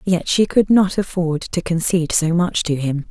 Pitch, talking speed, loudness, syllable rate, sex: 175 Hz, 215 wpm, -18 LUFS, 4.7 syllables/s, female